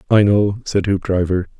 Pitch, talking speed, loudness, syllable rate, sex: 100 Hz, 150 wpm, -17 LUFS, 4.8 syllables/s, male